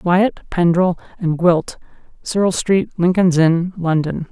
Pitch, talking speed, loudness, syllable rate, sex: 175 Hz, 125 wpm, -17 LUFS, 3.8 syllables/s, female